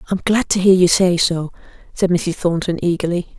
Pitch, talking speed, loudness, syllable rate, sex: 180 Hz, 195 wpm, -17 LUFS, 5.1 syllables/s, female